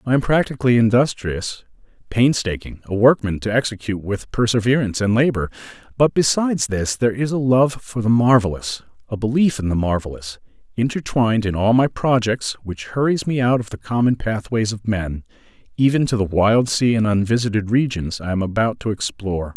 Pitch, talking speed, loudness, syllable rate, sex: 115 Hz, 165 wpm, -19 LUFS, 5.5 syllables/s, male